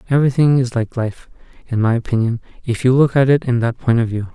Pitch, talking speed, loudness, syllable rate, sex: 125 Hz, 235 wpm, -17 LUFS, 6.2 syllables/s, male